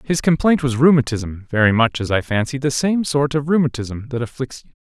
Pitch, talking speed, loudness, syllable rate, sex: 130 Hz, 210 wpm, -18 LUFS, 5.5 syllables/s, male